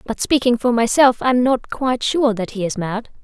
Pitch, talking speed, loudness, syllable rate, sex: 240 Hz, 220 wpm, -18 LUFS, 5.1 syllables/s, female